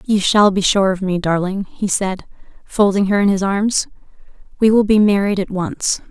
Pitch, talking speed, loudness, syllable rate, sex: 195 Hz, 195 wpm, -16 LUFS, 4.7 syllables/s, female